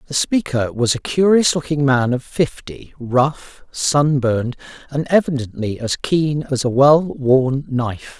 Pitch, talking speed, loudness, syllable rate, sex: 135 Hz, 145 wpm, -18 LUFS, 4.0 syllables/s, male